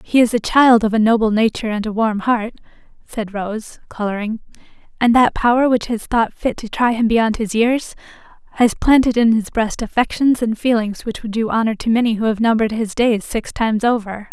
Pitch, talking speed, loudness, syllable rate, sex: 225 Hz, 210 wpm, -17 LUFS, 5.3 syllables/s, female